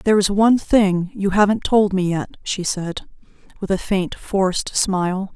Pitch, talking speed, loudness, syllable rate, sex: 195 Hz, 180 wpm, -19 LUFS, 4.6 syllables/s, female